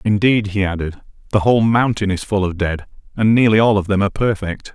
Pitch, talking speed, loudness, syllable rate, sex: 105 Hz, 215 wpm, -17 LUFS, 5.9 syllables/s, male